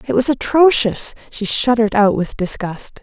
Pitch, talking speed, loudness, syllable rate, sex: 225 Hz, 160 wpm, -16 LUFS, 4.7 syllables/s, female